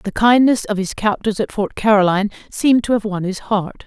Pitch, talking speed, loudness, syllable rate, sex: 210 Hz, 215 wpm, -17 LUFS, 5.5 syllables/s, female